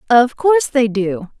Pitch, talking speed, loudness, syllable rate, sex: 255 Hz, 170 wpm, -15 LUFS, 4.5 syllables/s, female